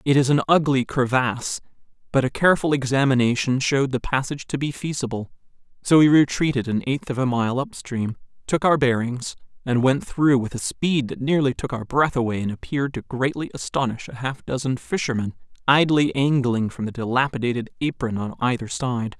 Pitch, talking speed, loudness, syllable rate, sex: 130 Hz, 180 wpm, -22 LUFS, 5.5 syllables/s, male